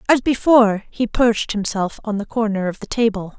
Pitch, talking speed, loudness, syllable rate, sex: 220 Hz, 195 wpm, -19 LUFS, 5.5 syllables/s, female